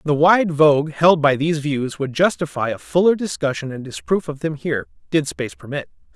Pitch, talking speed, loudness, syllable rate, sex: 150 Hz, 195 wpm, -19 LUFS, 5.6 syllables/s, male